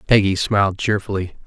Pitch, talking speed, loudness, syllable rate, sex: 100 Hz, 125 wpm, -19 LUFS, 5.7 syllables/s, male